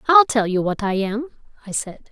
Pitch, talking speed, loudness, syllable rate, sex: 230 Hz, 225 wpm, -20 LUFS, 5.1 syllables/s, female